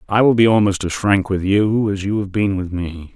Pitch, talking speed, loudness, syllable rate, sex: 100 Hz, 265 wpm, -17 LUFS, 5.1 syllables/s, male